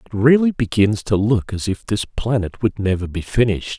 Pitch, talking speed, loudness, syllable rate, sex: 110 Hz, 205 wpm, -19 LUFS, 5.2 syllables/s, male